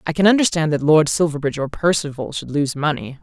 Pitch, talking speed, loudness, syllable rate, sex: 155 Hz, 205 wpm, -18 LUFS, 6.2 syllables/s, female